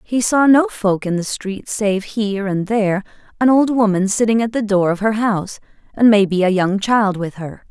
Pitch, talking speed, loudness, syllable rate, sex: 210 Hz, 220 wpm, -17 LUFS, 4.9 syllables/s, female